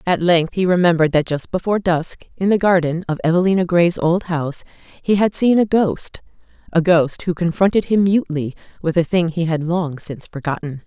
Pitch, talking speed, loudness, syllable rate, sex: 170 Hz, 190 wpm, -18 LUFS, 5.4 syllables/s, female